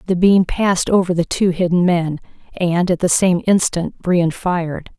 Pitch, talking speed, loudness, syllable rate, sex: 175 Hz, 180 wpm, -17 LUFS, 4.6 syllables/s, female